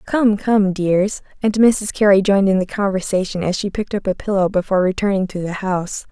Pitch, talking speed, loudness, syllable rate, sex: 195 Hz, 205 wpm, -18 LUFS, 5.7 syllables/s, female